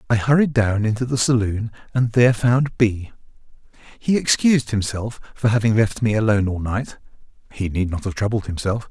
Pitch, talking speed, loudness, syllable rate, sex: 110 Hz, 170 wpm, -20 LUFS, 5.4 syllables/s, male